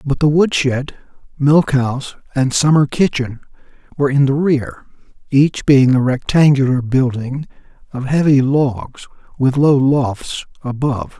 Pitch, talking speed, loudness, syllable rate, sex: 135 Hz, 135 wpm, -15 LUFS, 4.2 syllables/s, male